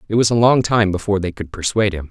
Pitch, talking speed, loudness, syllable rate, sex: 100 Hz, 285 wpm, -17 LUFS, 7.3 syllables/s, male